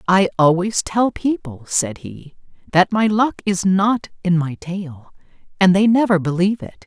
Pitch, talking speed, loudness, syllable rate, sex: 185 Hz, 165 wpm, -18 LUFS, 4.3 syllables/s, female